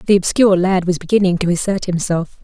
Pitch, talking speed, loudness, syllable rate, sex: 185 Hz, 195 wpm, -16 LUFS, 6.3 syllables/s, female